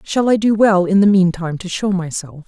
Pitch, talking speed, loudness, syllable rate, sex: 190 Hz, 265 wpm, -15 LUFS, 5.1 syllables/s, female